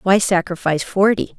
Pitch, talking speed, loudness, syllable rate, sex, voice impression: 185 Hz, 130 wpm, -17 LUFS, 5.6 syllables/s, female, feminine, young, tensed, bright, soft, clear, halting, calm, friendly, slightly sweet, lively